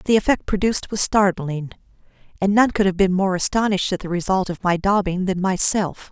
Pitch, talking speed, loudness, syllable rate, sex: 190 Hz, 195 wpm, -20 LUFS, 5.7 syllables/s, female